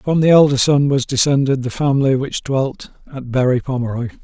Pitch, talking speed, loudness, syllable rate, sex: 135 Hz, 185 wpm, -16 LUFS, 5.5 syllables/s, male